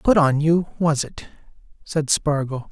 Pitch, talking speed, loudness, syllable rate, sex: 150 Hz, 155 wpm, -21 LUFS, 4.0 syllables/s, male